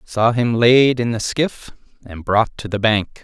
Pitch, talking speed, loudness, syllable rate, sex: 115 Hz, 205 wpm, -17 LUFS, 3.9 syllables/s, male